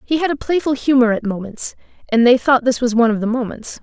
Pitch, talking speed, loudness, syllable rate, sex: 245 Hz, 250 wpm, -17 LUFS, 6.2 syllables/s, female